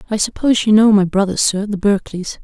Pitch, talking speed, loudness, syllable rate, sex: 205 Hz, 220 wpm, -15 LUFS, 5.9 syllables/s, female